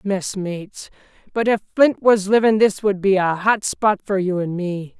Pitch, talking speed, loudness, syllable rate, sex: 200 Hz, 190 wpm, -19 LUFS, 4.5 syllables/s, female